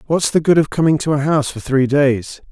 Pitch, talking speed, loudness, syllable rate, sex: 145 Hz, 265 wpm, -16 LUFS, 5.7 syllables/s, male